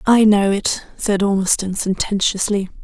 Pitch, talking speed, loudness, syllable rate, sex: 200 Hz, 125 wpm, -17 LUFS, 4.4 syllables/s, female